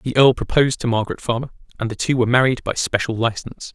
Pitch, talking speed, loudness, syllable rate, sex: 120 Hz, 225 wpm, -19 LUFS, 7.1 syllables/s, male